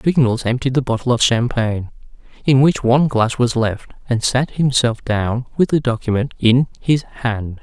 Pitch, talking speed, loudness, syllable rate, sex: 125 Hz, 175 wpm, -17 LUFS, 4.9 syllables/s, male